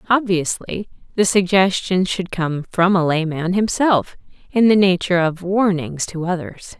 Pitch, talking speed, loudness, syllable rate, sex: 185 Hz, 140 wpm, -18 LUFS, 4.4 syllables/s, female